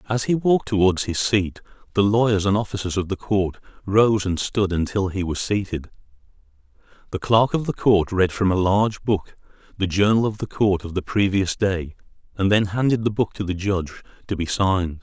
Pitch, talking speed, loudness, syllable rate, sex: 100 Hz, 200 wpm, -21 LUFS, 5.3 syllables/s, male